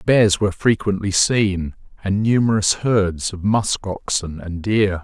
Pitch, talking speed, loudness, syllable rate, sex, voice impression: 100 Hz, 145 wpm, -19 LUFS, 3.9 syllables/s, male, masculine, middle-aged, slightly powerful, halting, raspy, sincere, calm, mature, wild, slightly strict, slightly modest